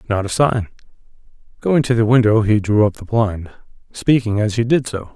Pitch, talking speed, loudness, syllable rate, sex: 110 Hz, 185 wpm, -17 LUFS, 5.3 syllables/s, male